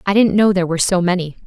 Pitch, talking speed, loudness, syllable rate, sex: 185 Hz, 285 wpm, -16 LUFS, 7.9 syllables/s, female